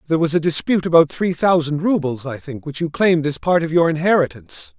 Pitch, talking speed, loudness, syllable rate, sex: 155 Hz, 225 wpm, -18 LUFS, 6.3 syllables/s, male